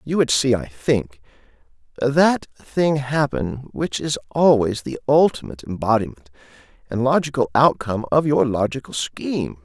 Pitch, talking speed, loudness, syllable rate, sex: 120 Hz, 130 wpm, -20 LUFS, 4.7 syllables/s, male